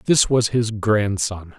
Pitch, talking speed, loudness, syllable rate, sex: 110 Hz, 150 wpm, -19 LUFS, 3.2 syllables/s, male